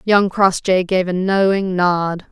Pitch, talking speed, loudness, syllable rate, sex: 185 Hz, 155 wpm, -16 LUFS, 3.6 syllables/s, female